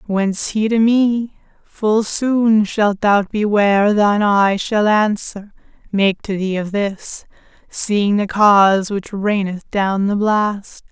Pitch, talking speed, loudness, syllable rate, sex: 205 Hz, 150 wpm, -16 LUFS, 3.4 syllables/s, female